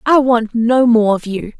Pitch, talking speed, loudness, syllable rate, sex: 235 Hz, 225 wpm, -13 LUFS, 4.3 syllables/s, female